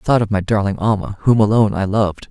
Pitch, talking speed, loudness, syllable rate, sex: 105 Hz, 260 wpm, -17 LUFS, 7.1 syllables/s, male